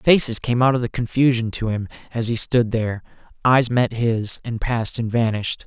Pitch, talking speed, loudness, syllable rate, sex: 115 Hz, 200 wpm, -20 LUFS, 5.3 syllables/s, male